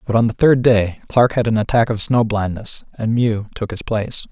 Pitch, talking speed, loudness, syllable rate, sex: 110 Hz, 235 wpm, -18 LUFS, 5.1 syllables/s, male